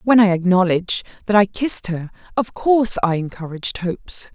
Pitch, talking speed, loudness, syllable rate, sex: 195 Hz, 165 wpm, -19 LUFS, 5.7 syllables/s, female